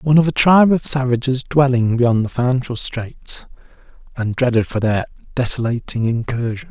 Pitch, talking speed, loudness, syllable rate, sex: 125 Hz, 150 wpm, -17 LUFS, 5.2 syllables/s, male